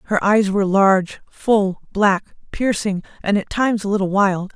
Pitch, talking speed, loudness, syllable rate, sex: 200 Hz, 170 wpm, -18 LUFS, 5.0 syllables/s, female